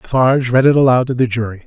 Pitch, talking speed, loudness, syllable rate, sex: 125 Hz, 250 wpm, -14 LUFS, 6.8 syllables/s, male